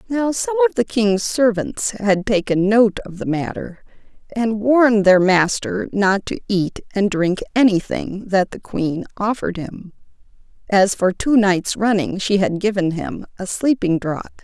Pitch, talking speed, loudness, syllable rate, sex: 205 Hz, 160 wpm, -18 LUFS, 4.1 syllables/s, female